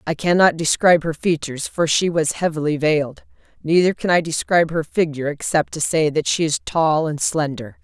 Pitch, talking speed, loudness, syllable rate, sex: 160 Hz, 190 wpm, -19 LUFS, 5.4 syllables/s, female